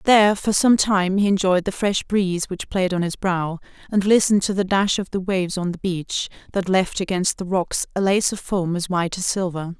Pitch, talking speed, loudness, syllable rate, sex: 190 Hz, 235 wpm, -21 LUFS, 5.2 syllables/s, female